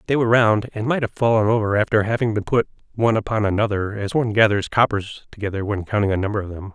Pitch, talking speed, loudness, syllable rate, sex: 105 Hz, 230 wpm, -20 LUFS, 6.8 syllables/s, male